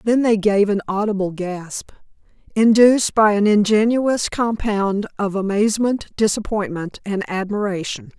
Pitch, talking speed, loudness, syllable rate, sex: 205 Hz, 115 wpm, -19 LUFS, 4.5 syllables/s, female